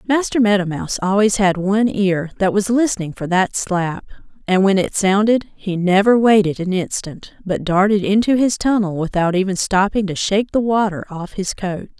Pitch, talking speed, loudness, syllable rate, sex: 195 Hz, 185 wpm, -17 LUFS, 5.1 syllables/s, female